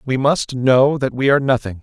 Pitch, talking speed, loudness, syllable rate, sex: 130 Hz, 230 wpm, -16 LUFS, 5.3 syllables/s, male